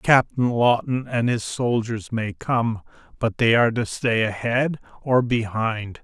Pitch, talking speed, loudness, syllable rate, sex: 120 Hz, 150 wpm, -22 LUFS, 3.9 syllables/s, male